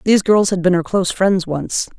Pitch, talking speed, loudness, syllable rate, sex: 185 Hz, 240 wpm, -16 LUFS, 5.6 syllables/s, female